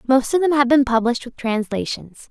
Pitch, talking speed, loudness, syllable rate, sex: 255 Hz, 210 wpm, -19 LUFS, 5.6 syllables/s, female